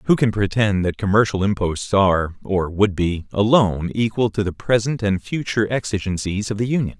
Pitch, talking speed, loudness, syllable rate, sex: 100 Hz, 180 wpm, -20 LUFS, 5.4 syllables/s, male